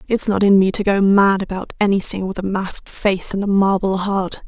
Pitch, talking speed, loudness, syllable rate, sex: 195 Hz, 230 wpm, -17 LUFS, 5.2 syllables/s, female